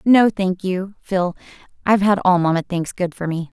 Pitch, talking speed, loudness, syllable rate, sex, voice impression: 185 Hz, 200 wpm, -19 LUFS, 4.8 syllables/s, female, very feminine, slightly young, slightly adult-like, thin, slightly tensed, powerful, bright, hard, clear, fluent, cute, slightly cool, intellectual, very refreshing, sincere, calm, friendly, reassuring, slightly unique, wild, slightly sweet, lively